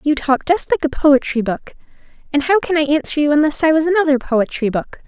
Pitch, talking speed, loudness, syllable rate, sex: 295 Hz, 225 wpm, -16 LUFS, 5.9 syllables/s, female